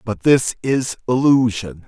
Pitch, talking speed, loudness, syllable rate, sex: 125 Hz, 130 wpm, -17 LUFS, 3.9 syllables/s, male